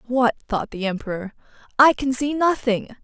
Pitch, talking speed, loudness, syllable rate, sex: 245 Hz, 160 wpm, -21 LUFS, 4.9 syllables/s, female